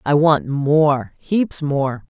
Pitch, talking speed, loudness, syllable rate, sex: 150 Hz, 110 wpm, -18 LUFS, 2.8 syllables/s, female